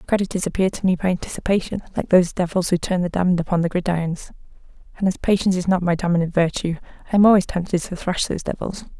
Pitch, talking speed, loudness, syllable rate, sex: 180 Hz, 215 wpm, -21 LUFS, 7.2 syllables/s, female